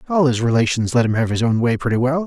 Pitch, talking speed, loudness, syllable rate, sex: 125 Hz, 290 wpm, -18 LUFS, 6.6 syllables/s, male